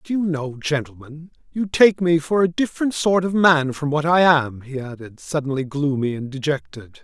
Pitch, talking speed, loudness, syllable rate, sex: 150 Hz, 195 wpm, -20 LUFS, 5.0 syllables/s, male